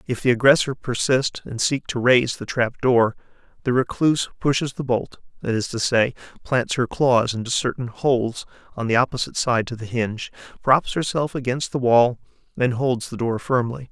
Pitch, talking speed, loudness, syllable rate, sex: 125 Hz, 185 wpm, -21 LUFS, 5.2 syllables/s, male